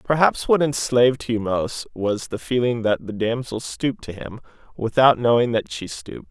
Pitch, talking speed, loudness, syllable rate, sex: 115 Hz, 180 wpm, -21 LUFS, 4.9 syllables/s, male